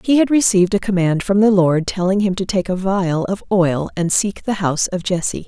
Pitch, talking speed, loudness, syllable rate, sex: 190 Hz, 240 wpm, -17 LUFS, 5.3 syllables/s, female